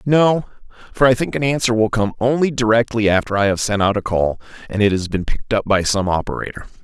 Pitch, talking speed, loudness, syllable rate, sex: 115 Hz, 230 wpm, -18 LUFS, 6.0 syllables/s, male